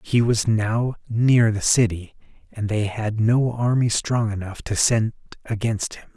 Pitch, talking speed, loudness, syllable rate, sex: 110 Hz, 165 wpm, -21 LUFS, 4.0 syllables/s, male